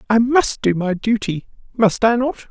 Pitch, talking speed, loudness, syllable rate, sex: 225 Hz, 190 wpm, -18 LUFS, 4.4 syllables/s, female